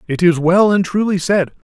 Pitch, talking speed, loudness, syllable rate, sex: 180 Hz, 210 wpm, -15 LUFS, 5.0 syllables/s, male